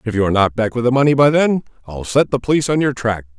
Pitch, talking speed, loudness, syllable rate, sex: 120 Hz, 300 wpm, -16 LUFS, 7.1 syllables/s, male